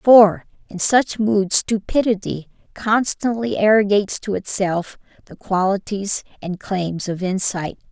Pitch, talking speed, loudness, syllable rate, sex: 200 Hz, 115 wpm, -19 LUFS, 4.0 syllables/s, female